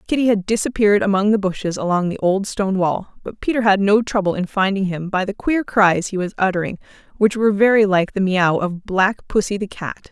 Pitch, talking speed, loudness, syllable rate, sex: 200 Hz, 220 wpm, -18 LUFS, 5.7 syllables/s, female